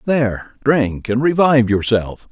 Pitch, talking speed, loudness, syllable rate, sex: 120 Hz, 130 wpm, -16 LUFS, 4.3 syllables/s, male